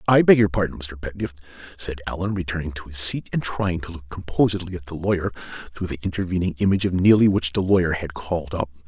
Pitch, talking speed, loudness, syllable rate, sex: 85 Hz, 215 wpm, -22 LUFS, 6.4 syllables/s, male